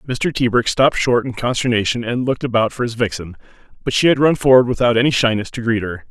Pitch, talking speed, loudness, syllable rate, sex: 120 Hz, 225 wpm, -17 LUFS, 6.4 syllables/s, male